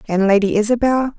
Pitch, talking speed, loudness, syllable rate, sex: 220 Hz, 150 wpm, -16 LUFS, 6.0 syllables/s, female